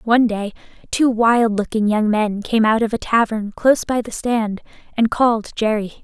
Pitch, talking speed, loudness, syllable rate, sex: 225 Hz, 190 wpm, -18 LUFS, 4.8 syllables/s, female